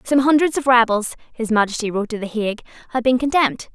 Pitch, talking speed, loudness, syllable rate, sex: 240 Hz, 210 wpm, -19 LUFS, 6.8 syllables/s, female